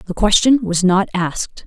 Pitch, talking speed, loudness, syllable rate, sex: 195 Hz, 180 wpm, -16 LUFS, 4.8 syllables/s, female